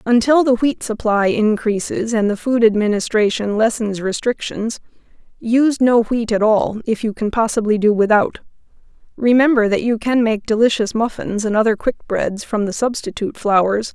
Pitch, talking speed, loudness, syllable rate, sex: 220 Hz, 160 wpm, -17 LUFS, 4.9 syllables/s, female